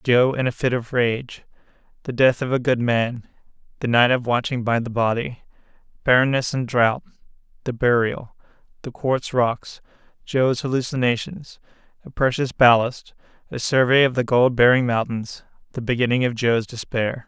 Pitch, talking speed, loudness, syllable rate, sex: 125 Hz, 120 wpm, -20 LUFS, 4.8 syllables/s, male